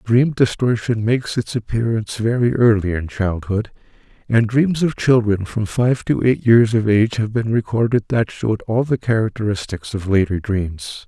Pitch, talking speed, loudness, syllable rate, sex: 110 Hz, 170 wpm, -18 LUFS, 4.8 syllables/s, male